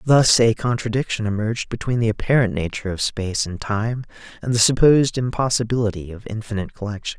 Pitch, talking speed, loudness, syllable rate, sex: 110 Hz, 160 wpm, -20 LUFS, 6.3 syllables/s, male